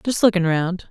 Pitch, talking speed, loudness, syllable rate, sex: 185 Hz, 200 wpm, -19 LUFS, 5.1 syllables/s, female